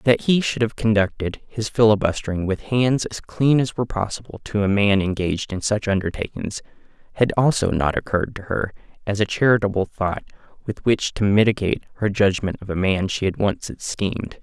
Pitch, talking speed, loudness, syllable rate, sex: 105 Hz, 185 wpm, -21 LUFS, 5.5 syllables/s, male